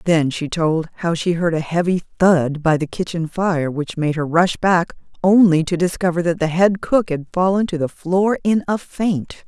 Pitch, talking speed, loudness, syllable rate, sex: 175 Hz, 210 wpm, -18 LUFS, 4.6 syllables/s, female